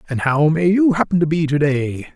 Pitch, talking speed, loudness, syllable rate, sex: 160 Hz, 250 wpm, -17 LUFS, 5.1 syllables/s, male